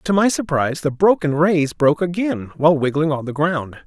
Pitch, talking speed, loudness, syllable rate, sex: 160 Hz, 200 wpm, -18 LUFS, 5.3 syllables/s, male